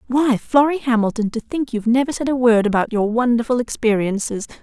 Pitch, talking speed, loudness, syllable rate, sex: 240 Hz, 180 wpm, -18 LUFS, 5.8 syllables/s, female